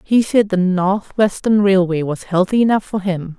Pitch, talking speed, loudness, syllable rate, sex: 195 Hz, 175 wpm, -16 LUFS, 4.6 syllables/s, female